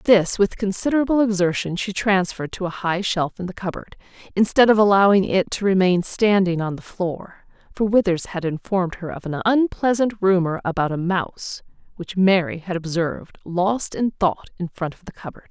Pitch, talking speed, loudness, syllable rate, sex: 190 Hz, 180 wpm, -21 LUFS, 5.3 syllables/s, female